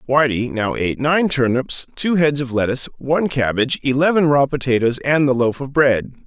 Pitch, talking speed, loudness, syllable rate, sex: 135 Hz, 180 wpm, -18 LUFS, 5.4 syllables/s, male